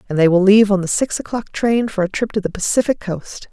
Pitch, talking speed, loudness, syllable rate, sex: 205 Hz, 275 wpm, -17 LUFS, 6.0 syllables/s, female